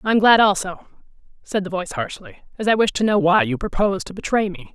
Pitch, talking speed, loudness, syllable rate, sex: 200 Hz, 240 wpm, -19 LUFS, 6.3 syllables/s, female